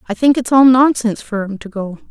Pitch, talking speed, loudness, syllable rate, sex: 230 Hz, 255 wpm, -14 LUFS, 5.9 syllables/s, female